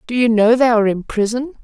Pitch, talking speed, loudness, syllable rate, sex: 235 Hz, 255 wpm, -15 LUFS, 6.3 syllables/s, female